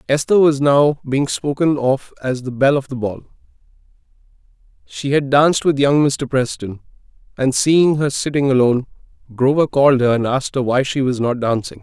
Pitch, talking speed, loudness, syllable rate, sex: 135 Hz, 180 wpm, -17 LUFS, 5.3 syllables/s, male